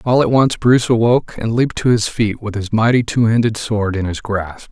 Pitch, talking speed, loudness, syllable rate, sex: 110 Hz, 240 wpm, -16 LUFS, 5.5 syllables/s, male